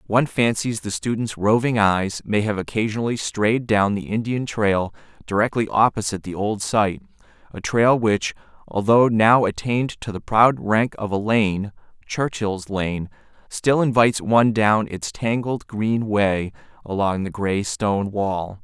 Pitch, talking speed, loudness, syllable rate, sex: 105 Hz, 150 wpm, -21 LUFS, 4.4 syllables/s, male